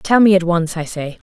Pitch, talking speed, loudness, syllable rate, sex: 180 Hz, 285 wpm, -16 LUFS, 5.0 syllables/s, female